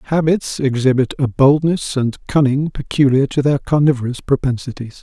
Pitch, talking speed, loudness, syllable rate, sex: 135 Hz, 130 wpm, -16 LUFS, 5.0 syllables/s, male